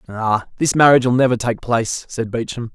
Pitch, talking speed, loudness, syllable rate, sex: 120 Hz, 195 wpm, -17 LUFS, 5.8 syllables/s, male